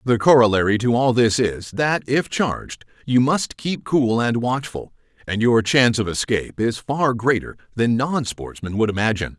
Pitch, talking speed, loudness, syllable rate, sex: 120 Hz, 180 wpm, -20 LUFS, 4.8 syllables/s, male